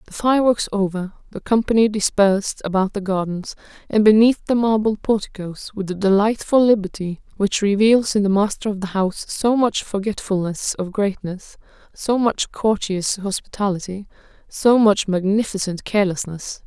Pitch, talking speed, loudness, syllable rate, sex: 205 Hz, 140 wpm, -19 LUFS, 5.0 syllables/s, female